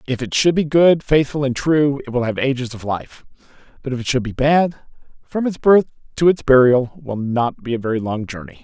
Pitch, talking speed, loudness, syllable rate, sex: 135 Hz, 230 wpm, -18 LUFS, 5.3 syllables/s, male